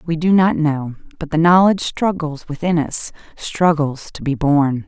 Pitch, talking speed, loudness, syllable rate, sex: 155 Hz, 170 wpm, -17 LUFS, 4.4 syllables/s, female